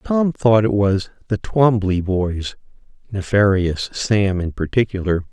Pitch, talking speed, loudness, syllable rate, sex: 100 Hz, 125 wpm, -18 LUFS, 3.9 syllables/s, male